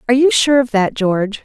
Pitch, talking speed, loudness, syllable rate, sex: 235 Hz, 250 wpm, -14 LUFS, 6.4 syllables/s, female